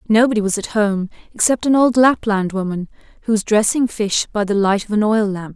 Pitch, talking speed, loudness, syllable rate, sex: 210 Hz, 215 wpm, -17 LUFS, 5.4 syllables/s, female